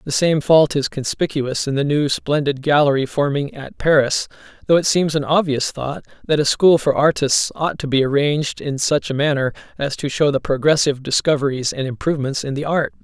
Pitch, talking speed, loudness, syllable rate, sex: 145 Hz, 200 wpm, -18 LUFS, 5.4 syllables/s, male